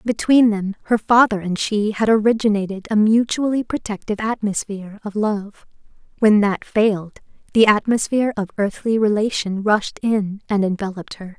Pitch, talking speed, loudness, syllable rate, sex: 210 Hz, 140 wpm, -19 LUFS, 5.1 syllables/s, female